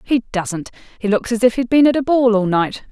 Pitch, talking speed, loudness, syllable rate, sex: 230 Hz, 265 wpm, -17 LUFS, 5.4 syllables/s, female